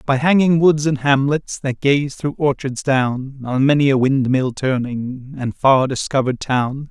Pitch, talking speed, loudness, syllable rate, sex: 135 Hz, 165 wpm, -18 LUFS, 4.2 syllables/s, male